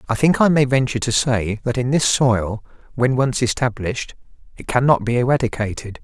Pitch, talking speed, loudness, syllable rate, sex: 120 Hz, 180 wpm, -19 LUFS, 5.5 syllables/s, male